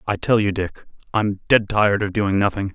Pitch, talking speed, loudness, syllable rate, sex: 100 Hz, 220 wpm, -20 LUFS, 5.3 syllables/s, male